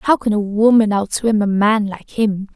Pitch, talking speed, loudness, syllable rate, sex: 215 Hz, 210 wpm, -16 LUFS, 4.5 syllables/s, female